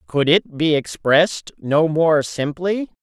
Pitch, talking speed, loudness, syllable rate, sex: 155 Hz, 140 wpm, -18 LUFS, 3.7 syllables/s, male